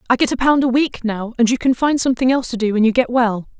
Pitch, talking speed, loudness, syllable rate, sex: 245 Hz, 315 wpm, -17 LUFS, 6.7 syllables/s, female